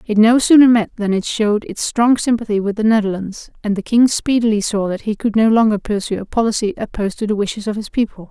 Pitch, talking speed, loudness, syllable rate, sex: 215 Hz, 240 wpm, -16 LUFS, 6.1 syllables/s, female